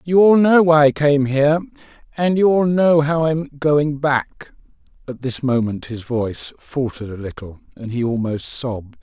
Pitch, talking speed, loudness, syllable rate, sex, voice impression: 140 Hz, 175 wpm, -18 LUFS, 4.6 syllables/s, male, very masculine, very adult-like, slightly old, thick, tensed, very powerful, very bright, very hard, very clear, fluent, slightly raspy, slightly cool, slightly intellectual, slightly sincere, calm, mature, slightly friendly, slightly reassuring, very unique, very wild, lively, very strict, intense